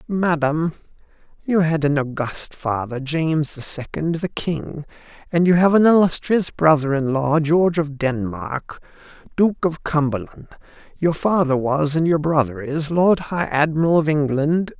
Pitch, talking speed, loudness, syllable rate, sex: 155 Hz, 150 wpm, -19 LUFS, 4.4 syllables/s, male